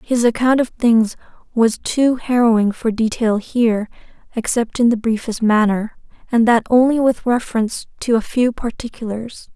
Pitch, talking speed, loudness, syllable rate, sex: 230 Hz, 150 wpm, -17 LUFS, 4.8 syllables/s, female